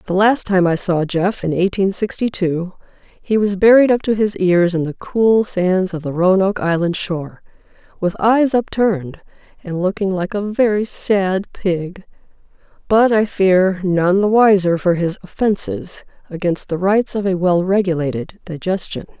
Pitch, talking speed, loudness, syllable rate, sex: 190 Hz, 165 wpm, -17 LUFS, 4.4 syllables/s, female